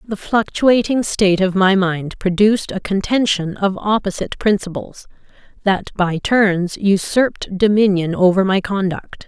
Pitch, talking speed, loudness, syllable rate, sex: 195 Hz, 130 wpm, -17 LUFS, 4.5 syllables/s, female